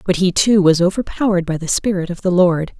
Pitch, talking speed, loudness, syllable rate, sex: 180 Hz, 235 wpm, -16 LUFS, 6.0 syllables/s, female